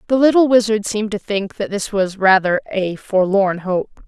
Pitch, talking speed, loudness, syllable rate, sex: 205 Hz, 190 wpm, -17 LUFS, 4.7 syllables/s, female